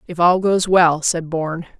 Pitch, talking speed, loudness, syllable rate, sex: 170 Hz, 200 wpm, -17 LUFS, 4.6 syllables/s, female